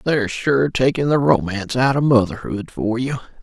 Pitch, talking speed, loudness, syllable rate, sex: 125 Hz, 160 wpm, -19 LUFS, 5.1 syllables/s, female